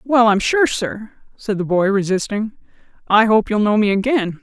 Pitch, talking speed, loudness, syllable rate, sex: 215 Hz, 190 wpm, -17 LUFS, 4.7 syllables/s, female